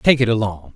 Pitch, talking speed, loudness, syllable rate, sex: 110 Hz, 235 wpm, -18 LUFS, 5.6 syllables/s, male